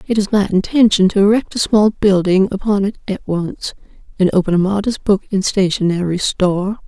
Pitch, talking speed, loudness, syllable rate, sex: 195 Hz, 185 wpm, -15 LUFS, 5.4 syllables/s, female